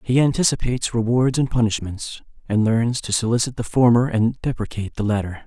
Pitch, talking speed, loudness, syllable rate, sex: 115 Hz, 165 wpm, -20 LUFS, 5.7 syllables/s, male